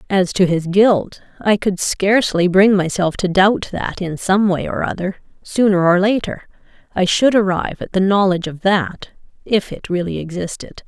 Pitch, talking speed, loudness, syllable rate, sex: 190 Hz, 175 wpm, -17 LUFS, 4.8 syllables/s, female